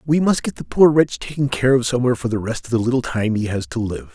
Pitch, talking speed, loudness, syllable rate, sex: 120 Hz, 305 wpm, -19 LUFS, 6.4 syllables/s, male